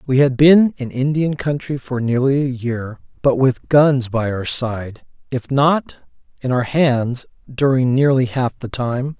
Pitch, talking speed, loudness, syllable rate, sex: 130 Hz, 170 wpm, -17 LUFS, 3.9 syllables/s, male